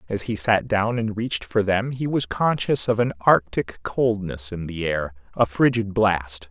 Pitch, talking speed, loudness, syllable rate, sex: 105 Hz, 195 wpm, -22 LUFS, 4.3 syllables/s, male